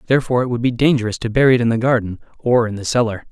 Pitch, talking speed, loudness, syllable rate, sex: 120 Hz, 270 wpm, -17 LUFS, 7.9 syllables/s, male